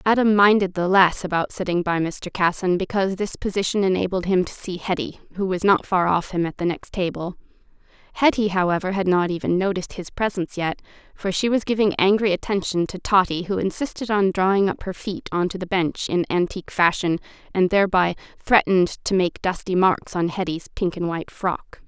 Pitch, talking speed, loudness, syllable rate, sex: 185 Hz, 195 wpm, -22 LUFS, 5.6 syllables/s, female